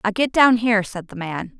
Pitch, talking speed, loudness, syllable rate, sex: 210 Hz, 265 wpm, -19 LUFS, 5.4 syllables/s, female